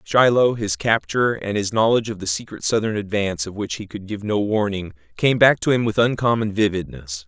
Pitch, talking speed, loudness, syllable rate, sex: 105 Hz, 205 wpm, -20 LUFS, 5.6 syllables/s, male